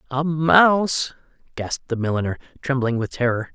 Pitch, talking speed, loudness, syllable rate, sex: 130 Hz, 135 wpm, -20 LUFS, 5.2 syllables/s, male